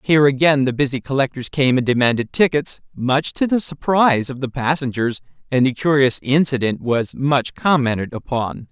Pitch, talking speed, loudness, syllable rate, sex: 135 Hz, 165 wpm, -18 LUFS, 5.2 syllables/s, male